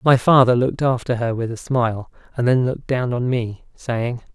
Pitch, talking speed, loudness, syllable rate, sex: 120 Hz, 205 wpm, -19 LUFS, 5.4 syllables/s, male